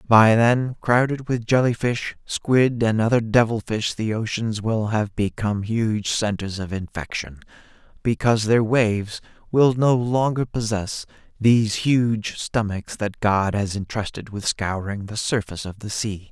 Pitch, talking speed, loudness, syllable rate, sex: 110 Hz, 145 wpm, -22 LUFS, 4.3 syllables/s, male